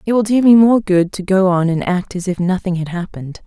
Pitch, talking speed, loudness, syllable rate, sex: 190 Hz, 275 wpm, -15 LUFS, 5.7 syllables/s, female